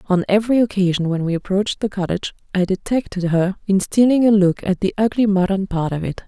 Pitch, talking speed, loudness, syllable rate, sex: 195 Hz, 210 wpm, -18 LUFS, 6.1 syllables/s, female